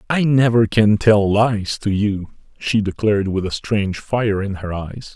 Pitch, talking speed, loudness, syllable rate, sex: 105 Hz, 185 wpm, -18 LUFS, 4.2 syllables/s, male